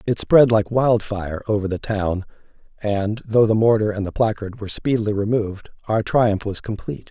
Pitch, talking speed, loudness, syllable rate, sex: 105 Hz, 175 wpm, -20 LUFS, 5.4 syllables/s, male